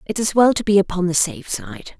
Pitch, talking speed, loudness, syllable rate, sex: 195 Hz, 270 wpm, -18 LUFS, 5.9 syllables/s, female